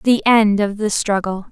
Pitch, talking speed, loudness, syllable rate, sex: 210 Hz, 200 wpm, -16 LUFS, 4.2 syllables/s, female